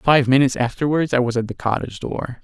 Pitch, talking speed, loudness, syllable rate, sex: 130 Hz, 220 wpm, -19 LUFS, 6.3 syllables/s, male